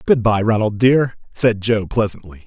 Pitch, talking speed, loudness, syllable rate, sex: 110 Hz, 170 wpm, -17 LUFS, 4.6 syllables/s, male